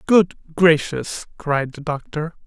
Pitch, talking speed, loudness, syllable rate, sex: 160 Hz, 120 wpm, -20 LUFS, 3.3 syllables/s, male